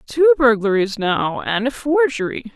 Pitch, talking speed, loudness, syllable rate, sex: 225 Hz, 140 wpm, -18 LUFS, 4.4 syllables/s, female